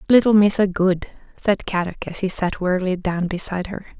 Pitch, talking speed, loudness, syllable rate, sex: 190 Hz, 180 wpm, -20 LUFS, 5.5 syllables/s, female